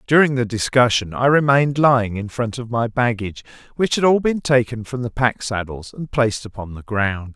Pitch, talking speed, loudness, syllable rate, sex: 120 Hz, 205 wpm, -19 LUFS, 5.4 syllables/s, male